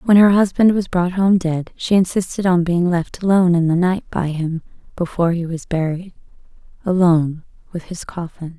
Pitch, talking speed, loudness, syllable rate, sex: 175 Hz, 175 wpm, -18 LUFS, 5.2 syllables/s, female